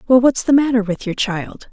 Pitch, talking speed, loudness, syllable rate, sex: 230 Hz, 245 wpm, -17 LUFS, 5.2 syllables/s, female